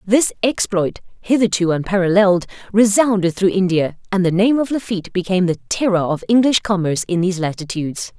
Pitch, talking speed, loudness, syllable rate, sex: 190 Hz, 155 wpm, -17 LUFS, 5.9 syllables/s, female